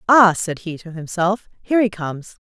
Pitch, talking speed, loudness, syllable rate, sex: 190 Hz, 195 wpm, -19 LUFS, 5.2 syllables/s, female